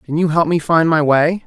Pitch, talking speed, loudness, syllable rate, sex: 160 Hz, 285 wpm, -15 LUFS, 5.2 syllables/s, male